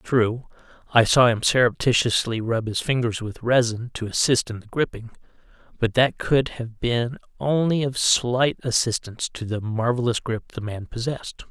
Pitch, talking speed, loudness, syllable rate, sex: 120 Hz, 160 wpm, -22 LUFS, 4.7 syllables/s, male